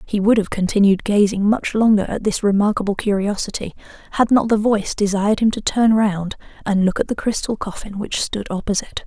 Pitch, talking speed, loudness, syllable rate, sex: 205 Hz, 190 wpm, -18 LUFS, 5.7 syllables/s, female